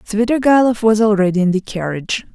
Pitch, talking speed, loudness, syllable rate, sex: 210 Hz, 155 wpm, -15 LUFS, 5.9 syllables/s, female